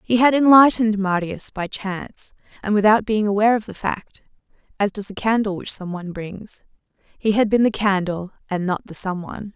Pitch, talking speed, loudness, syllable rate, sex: 205 Hz, 195 wpm, -20 LUFS, 5.4 syllables/s, female